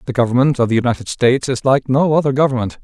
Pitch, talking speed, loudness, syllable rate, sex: 125 Hz, 235 wpm, -16 LUFS, 7.1 syllables/s, male